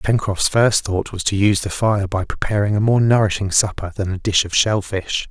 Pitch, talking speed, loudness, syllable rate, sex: 100 Hz, 225 wpm, -18 LUFS, 5.2 syllables/s, male